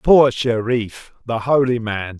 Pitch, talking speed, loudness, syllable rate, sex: 120 Hz, 110 wpm, -18 LUFS, 3.5 syllables/s, male